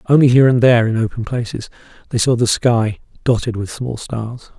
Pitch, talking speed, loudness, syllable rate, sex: 120 Hz, 195 wpm, -16 LUFS, 5.6 syllables/s, male